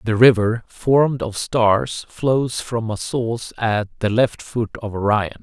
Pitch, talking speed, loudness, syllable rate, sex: 115 Hz, 165 wpm, -20 LUFS, 3.8 syllables/s, male